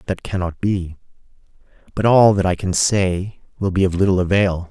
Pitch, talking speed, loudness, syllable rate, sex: 95 Hz, 180 wpm, -18 LUFS, 5.0 syllables/s, male